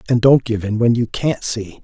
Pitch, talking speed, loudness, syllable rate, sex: 115 Hz, 260 wpm, -17 LUFS, 4.9 syllables/s, male